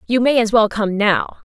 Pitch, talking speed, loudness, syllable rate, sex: 220 Hz, 240 wpm, -16 LUFS, 4.7 syllables/s, female